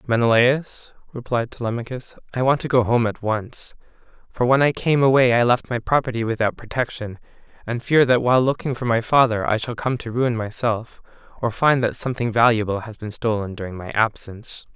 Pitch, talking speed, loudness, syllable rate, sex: 120 Hz, 185 wpm, -20 LUFS, 5.5 syllables/s, male